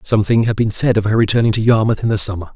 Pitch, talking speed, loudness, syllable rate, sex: 110 Hz, 280 wpm, -15 LUFS, 7.5 syllables/s, male